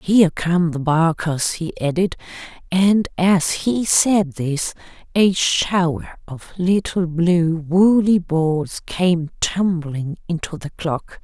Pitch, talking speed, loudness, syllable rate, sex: 170 Hz, 125 wpm, -19 LUFS, 3.2 syllables/s, female